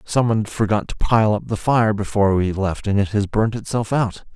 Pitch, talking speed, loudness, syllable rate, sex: 105 Hz, 220 wpm, -20 LUFS, 5.2 syllables/s, male